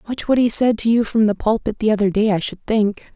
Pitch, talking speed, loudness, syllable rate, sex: 220 Hz, 285 wpm, -18 LUFS, 5.9 syllables/s, female